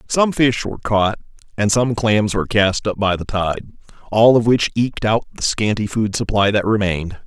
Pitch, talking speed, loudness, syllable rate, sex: 105 Hz, 200 wpm, -18 LUFS, 5.0 syllables/s, male